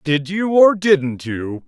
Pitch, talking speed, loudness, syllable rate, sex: 165 Hz, 180 wpm, -16 LUFS, 3.2 syllables/s, male